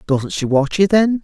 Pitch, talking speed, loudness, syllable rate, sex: 170 Hz, 245 wpm, -16 LUFS, 4.5 syllables/s, male